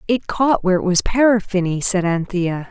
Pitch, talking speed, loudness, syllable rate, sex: 195 Hz, 180 wpm, -18 LUFS, 5.1 syllables/s, female